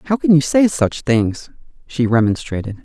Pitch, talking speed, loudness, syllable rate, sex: 130 Hz, 170 wpm, -16 LUFS, 4.8 syllables/s, male